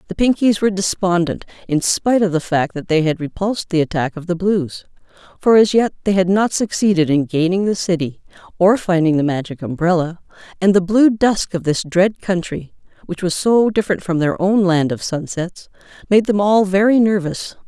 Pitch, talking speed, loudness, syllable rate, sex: 185 Hz, 185 wpm, -17 LUFS, 5.3 syllables/s, female